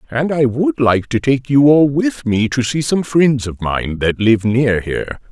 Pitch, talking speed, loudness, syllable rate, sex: 130 Hz, 225 wpm, -15 LUFS, 4.2 syllables/s, male